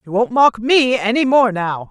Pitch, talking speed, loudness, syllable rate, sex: 230 Hz, 220 wpm, -15 LUFS, 4.5 syllables/s, female